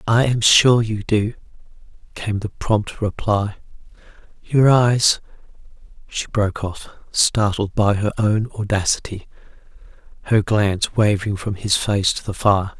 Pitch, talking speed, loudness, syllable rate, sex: 105 Hz, 130 wpm, -19 LUFS, 4.2 syllables/s, male